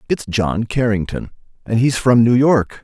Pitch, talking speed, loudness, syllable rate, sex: 115 Hz, 170 wpm, -16 LUFS, 4.3 syllables/s, male